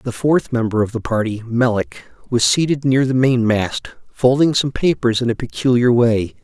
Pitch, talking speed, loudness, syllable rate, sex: 125 Hz, 175 wpm, -17 LUFS, 4.8 syllables/s, male